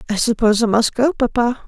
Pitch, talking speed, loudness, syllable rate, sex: 235 Hz, 215 wpm, -17 LUFS, 6.3 syllables/s, female